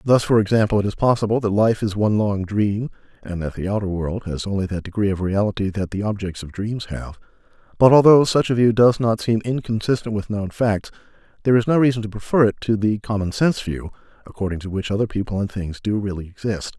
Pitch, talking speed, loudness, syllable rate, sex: 105 Hz, 225 wpm, -20 LUFS, 6.1 syllables/s, male